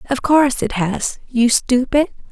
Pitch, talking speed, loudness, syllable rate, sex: 255 Hz, 155 wpm, -17 LUFS, 4.2 syllables/s, female